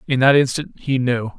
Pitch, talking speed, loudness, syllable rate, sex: 130 Hz, 215 wpm, -18 LUFS, 5.1 syllables/s, male